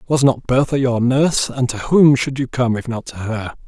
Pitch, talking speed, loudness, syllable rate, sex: 125 Hz, 245 wpm, -17 LUFS, 5.0 syllables/s, male